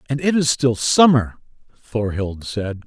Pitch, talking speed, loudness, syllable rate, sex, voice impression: 120 Hz, 145 wpm, -18 LUFS, 4.0 syllables/s, male, very masculine, very middle-aged, very thick, very tensed, very powerful, bright, slightly soft, slightly muffled, fluent, very cool, intellectual, slightly refreshing, very sincere, very calm, very mature, friendly, reassuring, very unique, elegant, very wild, very sweet, lively, kind, slightly modest